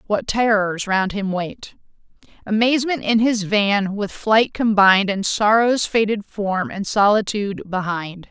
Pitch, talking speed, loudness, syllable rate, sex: 205 Hz, 135 wpm, -19 LUFS, 4.2 syllables/s, female